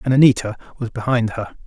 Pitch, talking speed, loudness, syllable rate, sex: 120 Hz, 180 wpm, -19 LUFS, 6.4 syllables/s, male